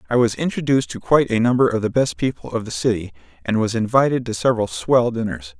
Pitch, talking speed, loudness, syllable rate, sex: 110 Hz, 225 wpm, -19 LUFS, 6.5 syllables/s, male